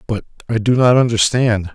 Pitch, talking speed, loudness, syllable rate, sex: 115 Hz, 170 wpm, -15 LUFS, 5.2 syllables/s, male